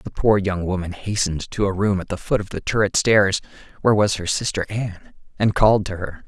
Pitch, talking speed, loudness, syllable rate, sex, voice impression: 95 Hz, 230 wpm, -21 LUFS, 5.7 syllables/s, male, masculine, adult-like, powerful, fluent, slightly cool, unique, slightly intense